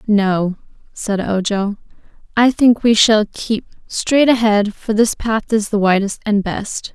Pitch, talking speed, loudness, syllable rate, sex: 215 Hz, 155 wpm, -16 LUFS, 3.8 syllables/s, female